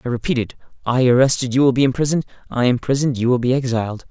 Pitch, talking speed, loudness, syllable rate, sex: 125 Hz, 190 wpm, -18 LUFS, 7.5 syllables/s, male